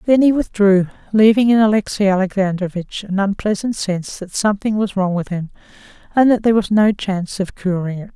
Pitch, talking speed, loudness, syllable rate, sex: 200 Hz, 185 wpm, -17 LUFS, 5.8 syllables/s, female